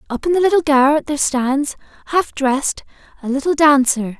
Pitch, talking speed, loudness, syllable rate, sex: 285 Hz, 170 wpm, -16 LUFS, 5.5 syllables/s, female